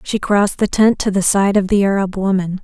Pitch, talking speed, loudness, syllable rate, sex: 195 Hz, 250 wpm, -15 LUFS, 5.5 syllables/s, female